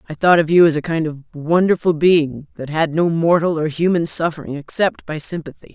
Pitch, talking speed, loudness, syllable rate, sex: 160 Hz, 210 wpm, -17 LUFS, 5.3 syllables/s, female